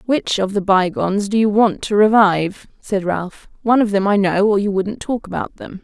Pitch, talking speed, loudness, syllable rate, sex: 200 Hz, 225 wpm, -17 LUFS, 5.2 syllables/s, female